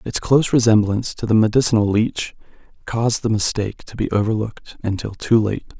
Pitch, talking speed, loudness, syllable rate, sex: 110 Hz, 165 wpm, -19 LUFS, 6.0 syllables/s, male